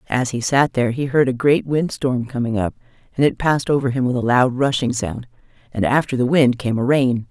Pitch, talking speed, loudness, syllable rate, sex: 130 Hz, 240 wpm, -19 LUFS, 5.6 syllables/s, female